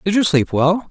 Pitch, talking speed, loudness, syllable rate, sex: 175 Hz, 265 wpm, -16 LUFS, 5.1 syllables/s, male